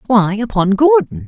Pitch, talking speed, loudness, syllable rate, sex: 215 Hz, 140 wpm, -14 LUFS, 4.5 syllables/s, female